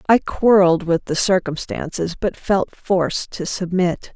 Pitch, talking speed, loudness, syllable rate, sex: 180 Hz, 145 wpm, -19 LUFS, 4.3 syllables/s, female